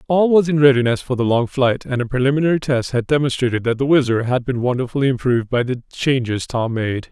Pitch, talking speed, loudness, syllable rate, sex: 130 Hz, 220 wpm, -18 LUFS, 6.2 syllables/s, male